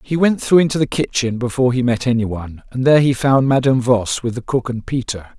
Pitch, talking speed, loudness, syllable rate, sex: 125 Hz, 245 wpm, -17 LUFS, 6.2 syllables/s, male